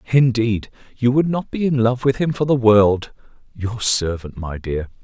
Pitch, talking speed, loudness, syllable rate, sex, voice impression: 115 Hz, 180 wpm, -19 LUFS, 4.5 syllables/s, male, masculine, slightly middle-aged, relaxed, slightly weak, slightly muffled, raspy, intellectual, mature, wild, strict, slightly modest